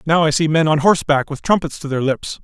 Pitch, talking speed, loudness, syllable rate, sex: 155 Hz, 270 wpm, -17 LUFS, 6.1 syllables/s, male